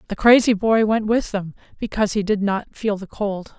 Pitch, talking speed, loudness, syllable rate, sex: 210 Hz, 220 wpm, -20 LUFS, 5.1 syllables/s, female